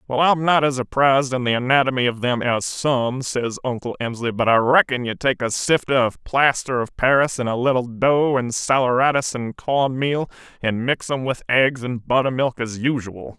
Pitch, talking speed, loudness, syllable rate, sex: 130 Hz, 195 wpm, -20 LUFS, 4.9 syllables/s, male